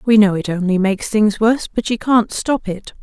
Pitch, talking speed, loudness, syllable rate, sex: 210 Hz, 240 wpm, -17 LUFS, 5.4 syllables/s, female